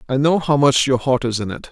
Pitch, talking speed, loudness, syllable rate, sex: 135 Hz, 315 wpm, -17 LUFS, 5.9 syllables/s, male